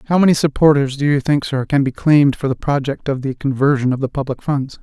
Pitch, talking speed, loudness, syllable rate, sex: 140 Hz, 250 wpm, -17 LUFS, 6.1 syllables/s, male